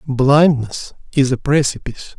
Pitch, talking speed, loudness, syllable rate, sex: 135 Hz, 110 wpm, -16 LUFS, 4.4 syllables/s, male